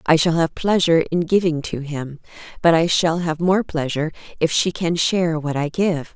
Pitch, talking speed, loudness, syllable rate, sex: 165 Hz, 205 wpm, -19 LUFS, 5.0 syllables/s, female